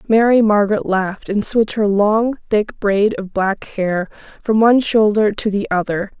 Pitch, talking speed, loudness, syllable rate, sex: 210 Hz, 175 wpm, -16 LUFS, 4.7 syllables/s, female